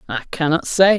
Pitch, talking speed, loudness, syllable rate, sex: 160 Hz, 185 wpm, -18 LUFS, 5.2 syllables/s, female